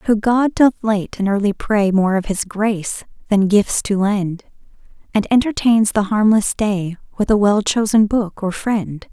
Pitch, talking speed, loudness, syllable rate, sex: 205 Hz, 180 wpm, -17 LUFS, 4.2 syllables/s, female